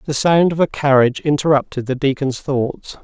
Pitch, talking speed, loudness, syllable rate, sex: 140 Hz, 180 wpm, -17 LUFS, 5.2 syllables/s, male